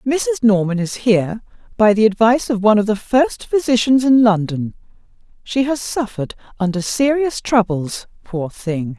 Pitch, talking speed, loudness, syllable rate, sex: 220 Hz, 155 wpm, -17 LUFS, 5.0 syllables/s, female